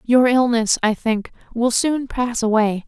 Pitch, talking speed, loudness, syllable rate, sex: 235 Hz, 165 wpm, -18 LUFS, 4.0 syllables/s, female